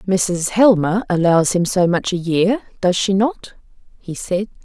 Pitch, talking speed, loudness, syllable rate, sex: 190 Hz, 155 wpm, -17 LUFS, 3.8 syllables/s, female